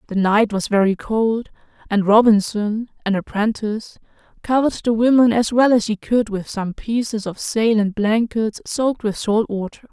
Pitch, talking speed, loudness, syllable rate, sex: 220 Hz, 170 wpm, -19 LUFS, 4.7 syllables/s, female